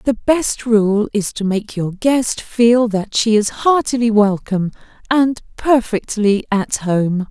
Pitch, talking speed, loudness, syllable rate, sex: 220 Hz, 150 wpm, -16 LUFS, 3.6 syllables/s, female